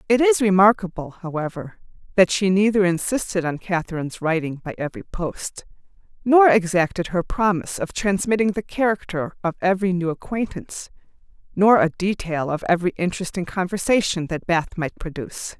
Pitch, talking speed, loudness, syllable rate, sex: 185 Hz, 140 wpm, -21 LUFS, 5.5 syllables/s, female